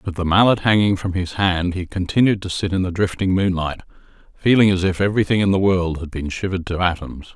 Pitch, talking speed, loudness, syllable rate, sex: 95 Hz, 220 wpm, -19 LUFS, 5.9 syllables/s, male